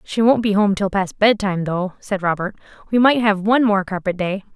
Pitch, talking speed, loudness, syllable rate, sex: 200 Hz, 225 wpm, -18 LUFS, 5.5 syllables/s, female